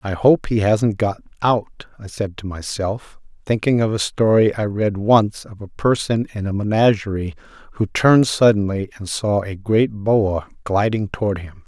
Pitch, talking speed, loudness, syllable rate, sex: 105 Hz, 175 wpm, -19 LUFS, 4.5 syllables/s, male